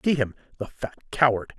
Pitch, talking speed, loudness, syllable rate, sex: 120 Hz, 150 wpm, -25 LUFS, 6.4 syllables/s, male